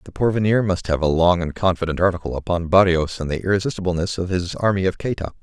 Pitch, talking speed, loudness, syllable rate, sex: 90 Hz, 210 wpm, -20 LUFS, 6.5 syllables/s, male